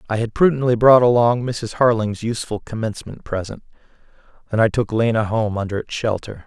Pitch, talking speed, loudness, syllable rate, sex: 115 Hz, 165 wpm, -19 LUFS, 5.7 syllables/s, male